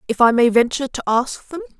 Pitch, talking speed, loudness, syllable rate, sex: 255 Hz, 235 wpm, -17 LUFS, 6.4 syllables/s, female